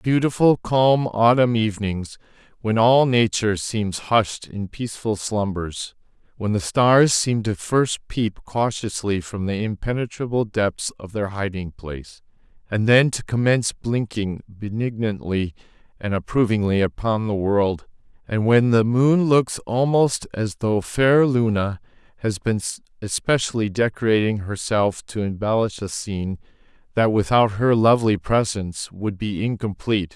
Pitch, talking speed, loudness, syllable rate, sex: 110 Hz, 130 wpm, -21 LUFS, 4.3 syllables/s, male